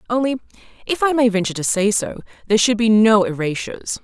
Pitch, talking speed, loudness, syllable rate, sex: 220 Hz, 195 wpm, -18 LUFS, 6.4 syllables/s, female